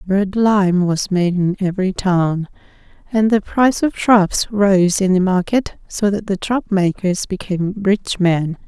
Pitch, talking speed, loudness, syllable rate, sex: 195 Hz, 165 wpm, -17 LUFS, 4.0 syllables/s, female